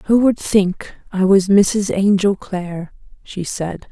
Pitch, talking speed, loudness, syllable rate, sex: 195 Hz, 155 wpm, -17 LUFS, 3.5 syllables/s, female